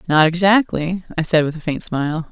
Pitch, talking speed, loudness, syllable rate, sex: 170 Hz, 210 wpm, -18 LUFS, 5.5 syllables/s, female